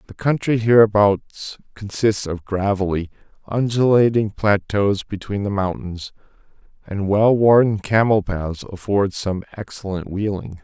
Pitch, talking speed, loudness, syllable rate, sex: 100 Hz, 115 wpm, -19 LUFS, 4.1 syllables/s, male